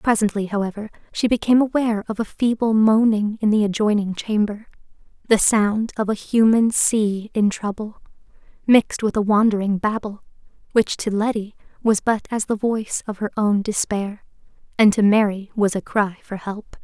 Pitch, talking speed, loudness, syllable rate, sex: 210 Hz, 160 wpm, -20 LUFS, 5.1 syllables/s, female